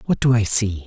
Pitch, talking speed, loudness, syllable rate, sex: 110 Hz, 275 wpm, -18 LUFS, 5.6 syllables/s, male